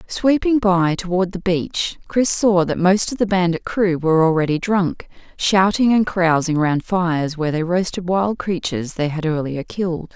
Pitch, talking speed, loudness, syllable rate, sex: 180 Hz, 175 wpm, -18 LUFS, 4.9 syllables/s, female